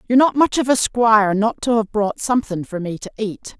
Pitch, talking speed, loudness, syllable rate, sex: 220 Hz, 250 wpm, -18 LUFS, 5.5 syllables/s, female